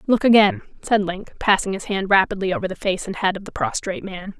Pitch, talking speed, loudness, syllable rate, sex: 200 Hz, 230 wpm, -20 LUFS, 6.1 syllables/s, female